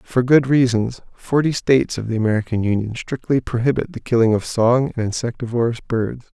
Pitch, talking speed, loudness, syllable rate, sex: 120 Hz, 170 wpm, -19 LUFS, 5.6 syllables/s, male